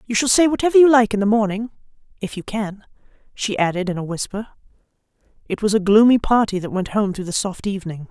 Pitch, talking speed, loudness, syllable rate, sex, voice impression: 210 Hz, 215 wpm, -19 LUFS, 6.2 syllables/s, female, feminine, adult-like, slightly tensed, powerful, clear, fluent, intellectual, slightly elegant, strict, intense, sharp